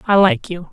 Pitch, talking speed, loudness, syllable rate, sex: 190 Hz, 250 wpm, -16 LUFS, 5.3 syllables/s, female